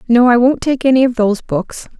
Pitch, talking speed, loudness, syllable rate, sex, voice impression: 240 Hz, 240 wpm, -13 LUFS, 5.8 syllables/s, female, feminine, slightly gender-neutral, adult-like, slightly middle-aged, thin, slightly relaxed, slightly weak, slightly dark, slightly hard, muffled, slightly fluent, slightly cute, intellectual, refreshing, sincere, slightly calm, slightly reassuring, slightly elegant, slightly wild, slightly sweet, lively, slightly strict, slightly sharp